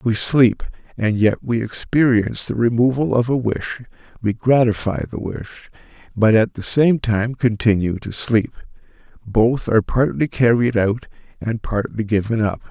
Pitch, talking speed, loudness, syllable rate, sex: 115 Hz, 150 wpm, -19 LUFS, 4.6 syllables/s, male